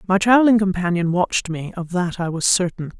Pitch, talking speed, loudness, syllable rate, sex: 185 Hz, 200 wpm, -19 LUFS, 5.8 syllables/s, female